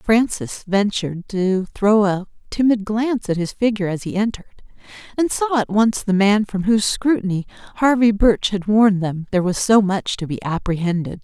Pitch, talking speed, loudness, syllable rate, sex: 205 Hz, 180 wpm, -19 LUFS, 5.3 syllables/s, female